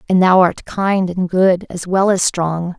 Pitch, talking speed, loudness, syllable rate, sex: 185 Hz, 215 wpm, -15 LUFS, 3.9 syllables/s, female